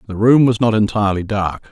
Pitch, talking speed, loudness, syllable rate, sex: 105 Hz, 210 wpm, -15 LUFS, 5.9 syllables/s, male